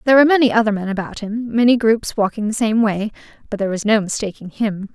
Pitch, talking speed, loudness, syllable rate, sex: 220 Hz, 230 wpm, -18 LUFS, 6.6 syllables/s, female